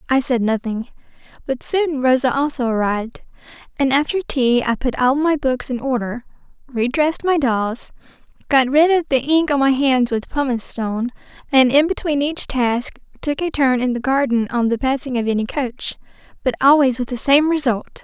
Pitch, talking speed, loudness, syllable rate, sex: 260 Hz, 185 wpm, -18 LUFS, 5.1 syllables/s, female